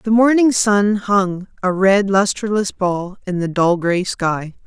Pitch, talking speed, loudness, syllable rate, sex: 195 Hz, 165 wpm, -17 LUFS, 3.7 syllables/s, female